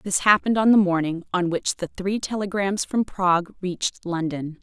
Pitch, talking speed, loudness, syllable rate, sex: 185 Hz, 180 wpm, -22 LUFS, 5.0 syllables/s, female